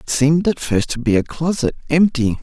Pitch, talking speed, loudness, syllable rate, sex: 145 Hz, 225 wpm, -18 LUFS, 5.4 syllables/s, male